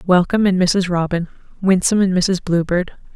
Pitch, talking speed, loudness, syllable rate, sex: 180 Hz, 150 wpm, -17 LUFS, 5.7 syllables/s, female